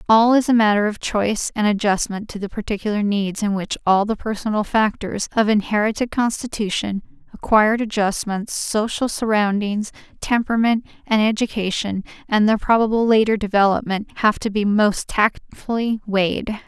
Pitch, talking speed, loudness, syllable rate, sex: 210 Hz, 140 wpm, -20 LUFS, 5.1 syllables/s, female